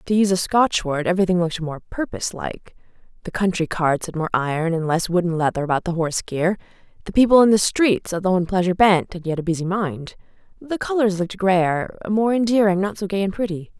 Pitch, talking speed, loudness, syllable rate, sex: 185 Hz, 215 wpm, -20 LUFS, 6.2 syllables/s, female